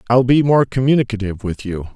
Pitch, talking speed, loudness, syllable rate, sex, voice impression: 115 Hz, 185 wpm, -17 LUFS, 6.4 syllables/s, male, very masculine, very adult-like, old, very thick, slightly relaxed, powerful, slightly bright, soft, muffled, slightly fluent, cool, very intellectual, sincere, very calm, very mature, very friendly, very reassuring, unique, slightly elegant, very wild, slightly sweet, slightly lively, kind, slightly modest